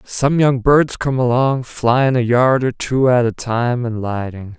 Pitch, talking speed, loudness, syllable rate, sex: 125 Hz, 195 wpm, -16 LUFS, 3.8 syllables/s, male